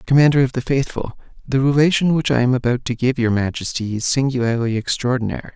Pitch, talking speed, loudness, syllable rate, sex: 125 Hz, 185 wpm, -18 LUFS, 6.2 syllables/s, male